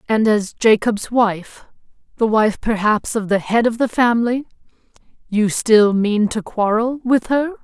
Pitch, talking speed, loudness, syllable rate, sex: 225 Hz, 140 wpm, -17 LUFS, 4.2 syllables/s, female